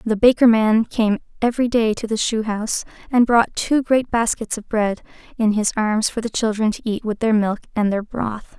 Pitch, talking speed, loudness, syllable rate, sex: 225 Hz, 215 wpm, -19 LUFS, 5.0 syllables/s, female